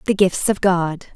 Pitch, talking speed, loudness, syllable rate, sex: 185 Hz, 205 wpm, -18 LUFS, 4.3 syllables/s, female